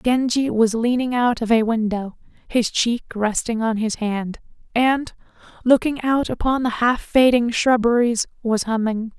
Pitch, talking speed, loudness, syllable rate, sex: 235 Hz, 150 wpm, -20 LUFS, 4.3 syllables/s, female